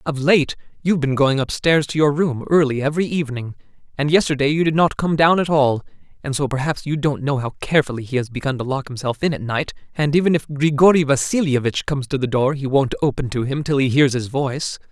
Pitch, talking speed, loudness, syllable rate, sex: 140 Hz, 230 wpm, -19 LUFS, 6.1 syllables/s, male